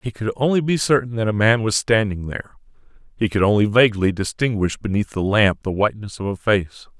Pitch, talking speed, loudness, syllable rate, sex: 110 Hz, 205 wpm, -19 LUFS, 5.8 syllables/s, male